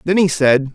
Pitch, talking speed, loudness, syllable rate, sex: 155 Hz, 240 wpm, -15 LUFS, 4.6 syllables/s, male